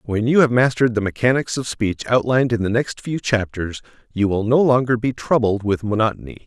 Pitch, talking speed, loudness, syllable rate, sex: 115 Hz, 205 wpm, -19 LUFS, 5.7 syllables/s, male